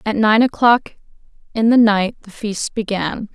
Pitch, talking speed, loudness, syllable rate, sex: 215 Hz, 160 wpm, -16 LUFS, 4.3 syllables/s, female